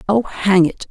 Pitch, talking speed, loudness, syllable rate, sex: 195 Hz, 200 wpm, -16 LUFS, 4.1 syllables/s, female